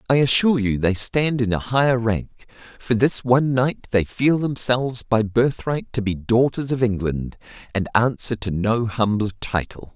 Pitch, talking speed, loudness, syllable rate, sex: 115 Hz, 175 wpm, -21 LUFS, 4.8 syllables/s, male